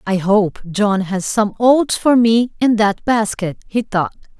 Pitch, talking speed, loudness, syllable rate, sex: 215 Hz, 180 wpm, -16 LUFS, 3.9 syllables/s, female